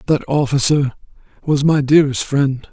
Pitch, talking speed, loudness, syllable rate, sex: 140 Hz, 130 wpm, -16 LUFS, 5.0 syllables/s, male